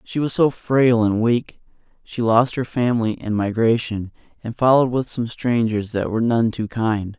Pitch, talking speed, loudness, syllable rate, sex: 115 Hz, 185 wpm, -20 LUFS, 4.7 syllables/s, male